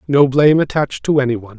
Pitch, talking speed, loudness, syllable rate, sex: 135 Hz, 190 wpm, -15 LUFS, 7.0 syllables/s, male